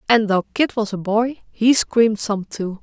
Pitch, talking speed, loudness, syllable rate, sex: 220 Hz, 210 wpm, -19 LUFS, 4.4 syllables/s, female